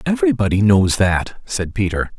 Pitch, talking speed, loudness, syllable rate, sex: 105 Hz, 135 wpm, -17 LUFS, 5.0 syllables/s, male